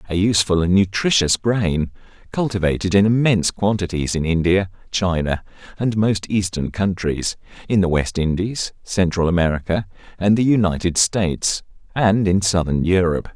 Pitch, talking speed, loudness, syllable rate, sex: 95 Hz, 135 wpm, -19 LUFS, 5.0 syllables/s, male